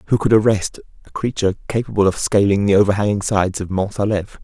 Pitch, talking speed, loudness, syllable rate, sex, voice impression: 100 Hz, 190 wpm, -18 LUFS, 6.8 syllables/s, male, very masculine, very adult-like, thick, tensed, slightly powerful, slightly bright, soft, slightly muffled, fluent, slightly raspy, cool, very intellectual, refreshing, slightly sincere, very calm, mature, very friendly, reassuring, very unique, slightly elegant, wild, sweet, lively, kind, slightly modest